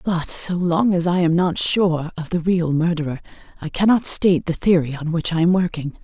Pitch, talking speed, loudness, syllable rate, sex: 170 Hz, 220 wpm, -19 LUFS, 5.1 syllables/s, female